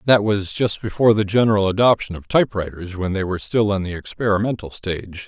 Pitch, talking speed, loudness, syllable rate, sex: 100 Hz, 195 wpm, -20 LUFS, 6.3 syllables/s, male